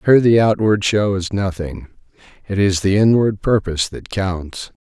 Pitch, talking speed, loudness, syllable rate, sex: 100 Hz, 160 wpm, -17 LUFS, 4.7 syllables/s, male